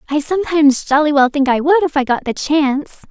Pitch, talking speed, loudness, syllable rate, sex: 295 Hz, 230 wpm, -15 LUFS, 6.1 syllables/s, female